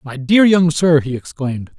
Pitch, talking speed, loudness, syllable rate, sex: 150 Hz, 200 wpm, -15 LUFS, 4.9 syllables/s, male